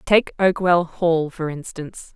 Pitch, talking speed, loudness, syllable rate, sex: 170 Hz, 140 wpm, -20 LUFS, 4.1 syllables/s, female